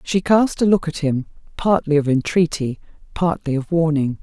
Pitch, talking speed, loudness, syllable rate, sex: 160 Hz, 170 wpm, -19 LUFS, 4.9 syllables/s, female